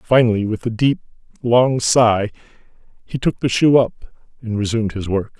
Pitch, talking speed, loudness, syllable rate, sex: 115 Hz, 165 wpm, -18 LUFS, 5.0 syllables/s, male